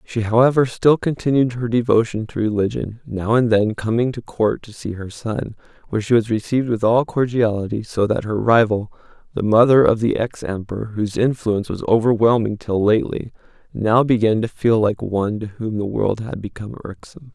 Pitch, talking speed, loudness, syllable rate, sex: 110 Hz, 185 wpm, -19 LUFS, 5.5 syllables/s, male